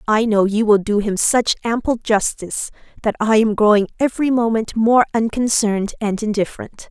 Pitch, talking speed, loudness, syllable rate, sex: 220 Hz, 165 wpm, -17 LUFS, 5.3 syllables/s, female